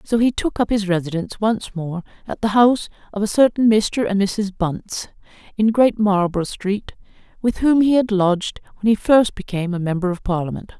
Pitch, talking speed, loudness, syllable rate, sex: 205 Hz, 195 wpm, -19 LUFS, 5.5 syllables/s, female